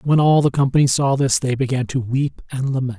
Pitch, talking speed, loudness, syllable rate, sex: 135 Hz, 260 wpm, -18 LUFS, 5.8 syllables/s, male